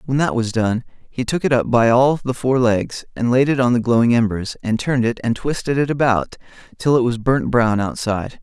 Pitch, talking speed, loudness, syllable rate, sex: 120 Hz, 235 wpm, -18 LUFS, 5.3 syllables/s, male